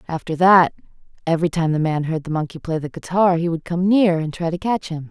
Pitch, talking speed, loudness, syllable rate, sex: 170 Hz, 245 wpm, -19 LUFS, 5.9 syllables/s, female